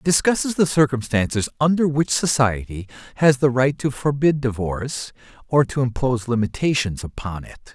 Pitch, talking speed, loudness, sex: 130 Hz, 140 wpm, -20 LUFS, male